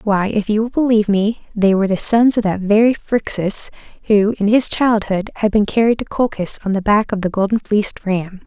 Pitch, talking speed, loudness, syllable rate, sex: 210 Hz, 220 wpm, -16 LUFS, 5.4 syllables/s, female